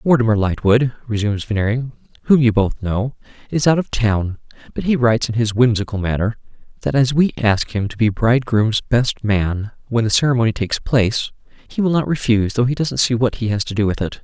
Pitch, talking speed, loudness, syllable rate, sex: 115 Hz, 205 wpm, -18 LUFS, 5.7 syllables/s, male